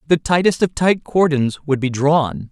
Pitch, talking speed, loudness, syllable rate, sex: 150 Hz, 190 wpm, -17 LUFS, 4.5 syllables/s, male